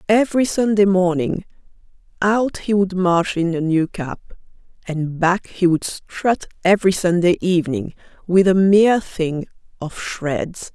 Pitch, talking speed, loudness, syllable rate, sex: 185 Hz, 140 wpm, -18 LUFS, 4.2 syllables/s, female